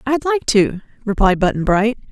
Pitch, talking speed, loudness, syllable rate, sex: 225 Hz, 170 wpm, -17 LUFS, 4.8 syllables/s, female